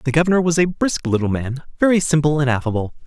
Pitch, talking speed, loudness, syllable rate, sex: 150 Hz, 215 wpm, -18 LUFS, 6.7 syllables/s, male